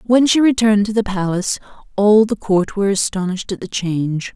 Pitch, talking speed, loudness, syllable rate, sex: 200 Hz, 195 wpm, -17 LUFS, 5.8 syllables/s, female